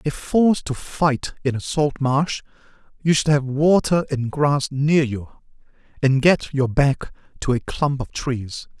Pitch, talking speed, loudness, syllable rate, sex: 140 Hz, 170 wpm, -20 LUFS, 3.9 syllables/s, male